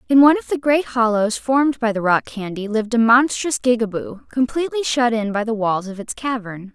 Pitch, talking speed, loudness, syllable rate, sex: 235 Hz, 215 wpm, -19 LUFS, 5.6 syllables/s, female